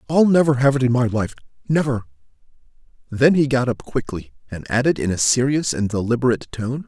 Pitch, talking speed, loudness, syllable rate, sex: 125 Hz, 185 wpm, -19 LUFS, 5.9 syllables/s, male